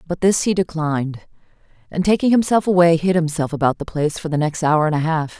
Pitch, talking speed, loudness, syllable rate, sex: 165 Hz, 220 wpm, -18 LUFS, 6.0 syllables/s, female